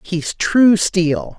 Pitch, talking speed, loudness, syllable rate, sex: 190 Hz, 130 wpm, -15 LUFS, 2.3 syllables/s, female